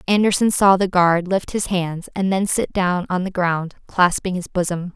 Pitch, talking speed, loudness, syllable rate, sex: 185 Hz, 205 wpm, -19 LUFS, 4.6 syllables/s, female